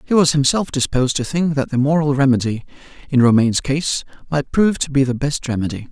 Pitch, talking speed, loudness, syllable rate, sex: 140 Hz, 205 wpm, -18 LUFS, 6.1 syllables/s, male